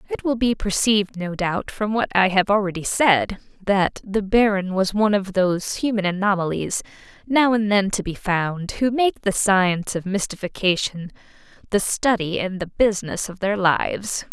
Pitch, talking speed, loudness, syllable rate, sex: 195 Hz, 170 wpm, -21 LUFS, 4.8 syllables/s, female